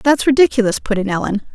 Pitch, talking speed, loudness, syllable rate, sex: 235 Hz, 195 wpm, -16 LUFS, 6.4 syllables/s, female